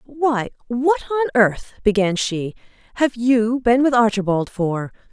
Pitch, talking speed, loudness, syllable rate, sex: 235 Hz, 130 wpm, -19 LUFS, 4.0 syllables/s, female